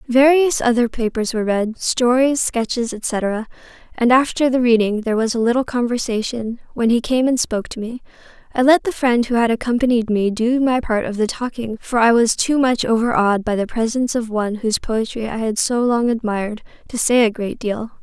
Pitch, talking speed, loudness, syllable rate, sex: 235 Hz, 200 wpm, -18 LUFS, 5.4 syllables/s, female